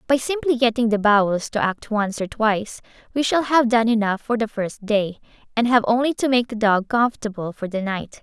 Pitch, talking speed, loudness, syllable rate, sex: 225 Hz, 220 wpm, -21 LUFS, 5.3 syllables/s, female